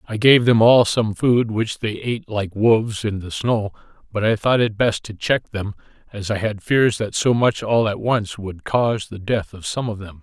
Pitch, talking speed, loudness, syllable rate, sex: 110 Hz, 235 wpm, -19 LUFS, 4.6 syllables/s, male